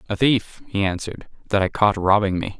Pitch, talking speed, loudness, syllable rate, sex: 100 Hz, 210 wpm, -21 LUFS, 5.7 syllables/s, male